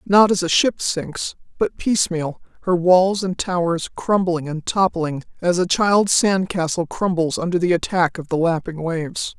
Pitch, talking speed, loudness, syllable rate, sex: 175 Hz, 175 wpm, -20 LUFS, 4.5 syllables/s, female